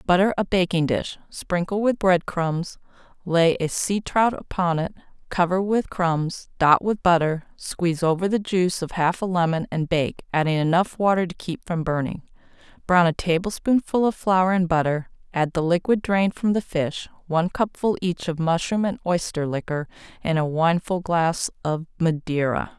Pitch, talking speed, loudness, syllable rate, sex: 175 Hz, 170 wpm, -23 LUFS, 4.8 syllables/s, female